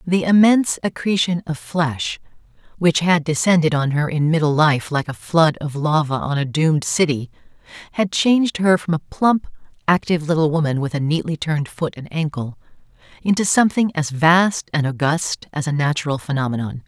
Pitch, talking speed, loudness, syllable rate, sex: 155 Hz, 170 wpm, -19 LUFS, 5.2 syllables/s, female